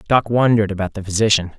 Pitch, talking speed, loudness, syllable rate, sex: 105 Hz, 190 wpm, -17 LUFS, 7.2 syllables/s, male